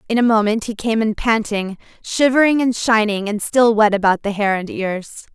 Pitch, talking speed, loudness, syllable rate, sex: 220 Hz, 200 wpm, -17 LUFS, 5.0 syllables/s, female